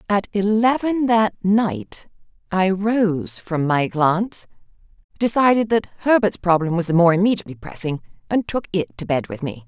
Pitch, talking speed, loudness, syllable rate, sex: 190 Hz, 155 wpm, -20 LUFS, 4.8 syllables/s, female